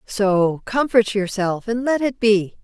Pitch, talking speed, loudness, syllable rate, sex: 215 Hz, 160 wpm, -19 LUFS, 3.7 syllables/s, female